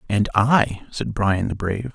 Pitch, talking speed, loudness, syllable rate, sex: 105 Hz, 185 wpm, -21 LUFS, 4.2 syllables/s, male